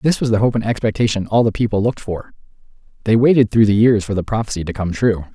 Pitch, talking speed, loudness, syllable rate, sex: 110 Hz, 245 wpm, -17 LUFS, 6.7 syllables/s, male